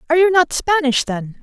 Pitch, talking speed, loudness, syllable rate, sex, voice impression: 305 Hz, 210 wpm, -16 LUFS, 5.7 syllables/s, female, feminine, adult-like, tensed, powerful, slightly bright, clear, raspy, intellectual, elegant, lively, slightly strict, sharp